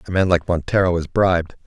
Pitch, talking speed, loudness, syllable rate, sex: 90 Hz, 215 wpm, -19 LUFS, 6.4 syllables/s, male